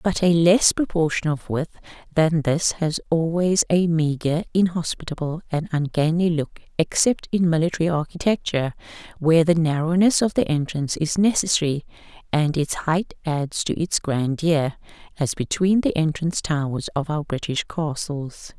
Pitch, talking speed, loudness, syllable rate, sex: 160 Hz, 140 wpm, -22 LUFS, 4.8 syllables/s, female